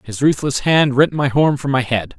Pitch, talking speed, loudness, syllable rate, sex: 135 Hz, 245 wpm, -16 LUFS, 4.8 syllables/s, male